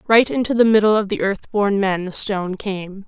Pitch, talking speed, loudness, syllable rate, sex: 200 Hz, 235 wpm, -19 LUFS, 5.1 syllables/s, female